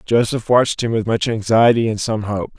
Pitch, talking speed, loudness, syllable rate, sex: 110 Hz, 210 wpm, -17 LUFS, 5.3 syllables/s, male